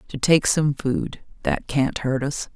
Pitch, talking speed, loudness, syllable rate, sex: 140 Hz, 190 wpm, -22 LUFS, 3.7 syllables/s, female